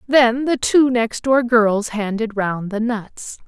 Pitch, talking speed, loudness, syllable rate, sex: 230 Hz, 175 wpm, -18 LUFS, 3.4 syllables/s, female